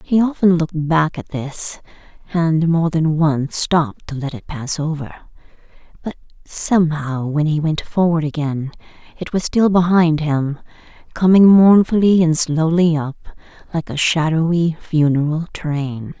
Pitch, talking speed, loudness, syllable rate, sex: 160 Hz, 140 wpm, -17 LUFS, 4.4 syllables/s, female